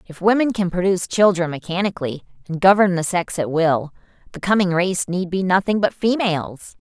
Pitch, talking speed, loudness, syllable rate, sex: 180 Hz, 175 wpm, -19 LUFS, 5.5 syllables/s, female